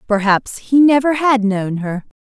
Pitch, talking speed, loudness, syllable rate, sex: 230 Hz, 160 wpm, -15 LUFS, 4.2 syllables/s, female